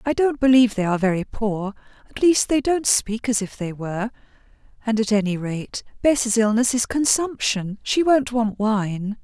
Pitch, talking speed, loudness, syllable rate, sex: 230 Hz, 170 wpm, -21 LUFS, 4.9 syllables/s, female